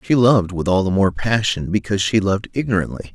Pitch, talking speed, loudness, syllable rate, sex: 100 Hz, 210 wpm, -18 LUFS, 6.4 syllables/s, male